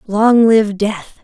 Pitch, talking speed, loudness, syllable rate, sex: 210 Hz, 145 wpm, -13 LUFS, 2.9 syllables/s, female